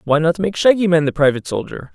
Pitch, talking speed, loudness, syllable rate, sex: 170 Hz, 245 wpm, -16 LUFS, 6.6 syllables/s, male